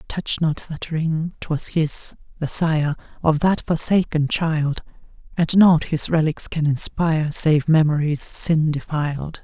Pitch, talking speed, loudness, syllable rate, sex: 155 Hz, 140 wpm, -20 LUFS, 3.8 syllables/s, female